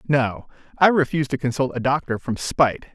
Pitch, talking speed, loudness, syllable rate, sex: 135 Hz, 185 wpm, -21 LUFS, 5.8 syllables/s, male